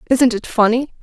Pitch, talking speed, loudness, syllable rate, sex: 240 Hz, 175 wpm, -16 LUFS, 5.2 syllables/s, female